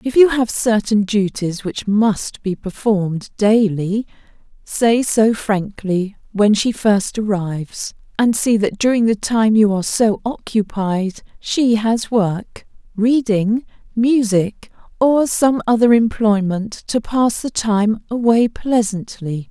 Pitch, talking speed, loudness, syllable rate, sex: 215 Hz, 130 wpm, -17 LUFS, 3.6 syllables/s, female